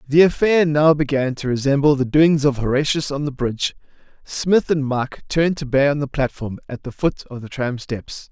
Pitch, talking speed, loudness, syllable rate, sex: 140 Hz, 215 wpm, -19 LUFS, 5.2 syllables/s, male